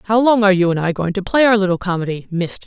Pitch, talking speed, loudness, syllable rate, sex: 195 Hz, 295 wpm, -16 LUFS, 7.0 syllables/s, female